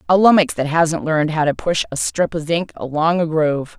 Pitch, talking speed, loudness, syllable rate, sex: 160 Hz, 240 wpm, -18 LUFS, 5.4 syllables/s, female